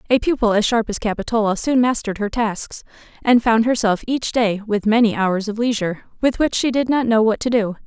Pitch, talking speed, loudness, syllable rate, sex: 225 Hz, 220 wpm, -19 LUFS, 5.7 syllables/s, female